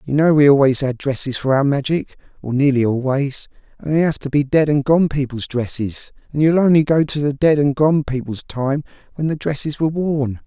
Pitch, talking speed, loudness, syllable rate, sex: 140 Hz, 220 wpm, -18 LUFS, 5.3 syllables/s, male